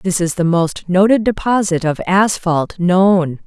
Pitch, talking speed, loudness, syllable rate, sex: 180 Hz, 155 wpm, -15 LUFS, 3.9 syllables/s, female